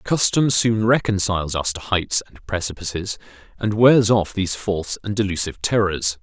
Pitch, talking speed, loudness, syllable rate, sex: 100 Hz, 155 wpm, -20 LUFS, 5.2 syllables/s, male